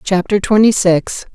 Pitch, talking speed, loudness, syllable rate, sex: 195 Hz, 135 wpm, -13 LUFS, 4.2 syllables/s, female